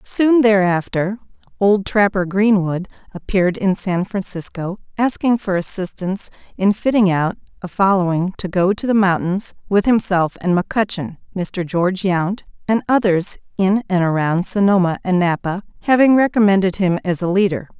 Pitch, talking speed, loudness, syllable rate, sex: 195 Hz, 140 wpm, -17 LUFS, 5.0 syllables/s, female